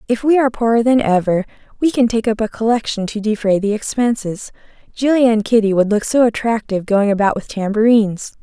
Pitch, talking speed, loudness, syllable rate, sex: 220 Hz, 190 wpm, -16 LUFS, 5.9 syllables/s, female